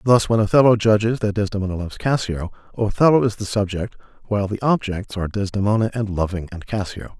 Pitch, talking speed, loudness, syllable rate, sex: 105 Hz, 175 wpm, -20 LUFS, 6.3 syllables/s, male